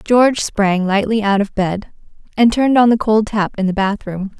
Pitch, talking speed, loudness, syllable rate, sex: 210 Hz, 220 wpm, -15 LUFS, 4.9 syllables/s, female